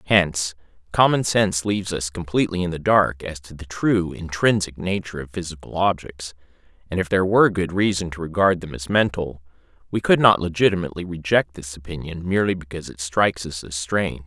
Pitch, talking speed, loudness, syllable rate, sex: 90 Hz, 180 wpm, -21 LUFS, 6.0 syllables/s, male